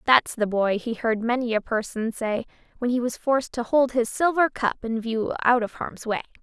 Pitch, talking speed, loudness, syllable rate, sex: 235 Hz, 225 wpm, -24 LUFS, 5.0 syllables/s, female